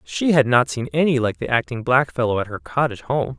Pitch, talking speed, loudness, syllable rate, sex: 125 Hz, 230 wpm, -20 LUFS, 5.9 syllables/s, male